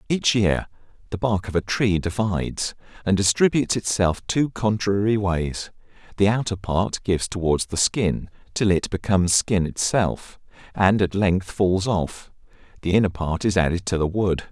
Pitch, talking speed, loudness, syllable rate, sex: 100 Hz, 160 wpm, -22 LUFS, 4.6 syllables/s, male